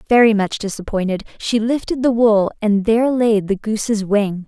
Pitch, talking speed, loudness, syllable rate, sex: 215 Hz, 175 wpm, -17 LUFS, 4.9 syllables/s, female